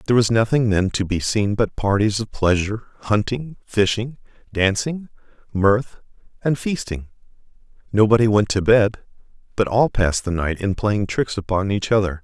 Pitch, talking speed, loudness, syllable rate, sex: 105 Hz, 155 wpm, -20 LUFS, 5.0 syllables/s, male